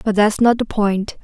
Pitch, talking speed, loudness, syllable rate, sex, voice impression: 215 Hz, 245 wpm, -17 LUFS, 4.5 syllables/s, female, very feminine, young, very thin, slightly tensed, slightly weak, slightly bright, hard, clear, fluent, slightly raspy, very cute, intellectual, refreshing, sincere, calm, friendly, reassuring, unique, elegant, slightly wild, very sweet, slightly lively, kind, slightly intense, slightly sharp, slightly modest